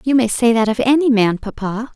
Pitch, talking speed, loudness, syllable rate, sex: 235 Hz, 245 wpm, -16 LUFS, 5.4 syllables/s, female